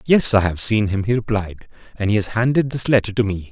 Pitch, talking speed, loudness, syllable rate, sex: 110 Hz, 255 wpm, -19 LUFS, 6.0 syllables/s, male